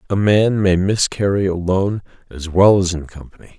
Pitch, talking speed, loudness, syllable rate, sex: 95 Hz, 165 wpm, -16 LUFS, 5.1 syllables/s, male